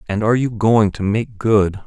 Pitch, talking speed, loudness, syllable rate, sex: 105 Hz, 225 wpm, -17 LUFS, 4.9 syllables/s, male